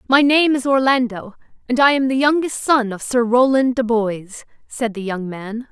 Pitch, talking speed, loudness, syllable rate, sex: 245 Hz, 200 wpm, -17 LUFS, 4.7 syllables/s, female